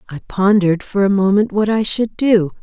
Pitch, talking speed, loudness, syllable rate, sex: 200 Hz, 205 wpm, -15 LUFS, 5.2 syllables/s, female